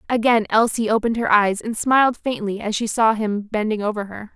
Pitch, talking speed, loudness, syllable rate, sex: 220 Hz, 205 wpm, -19 LUFS, 5.6 syllables/s, female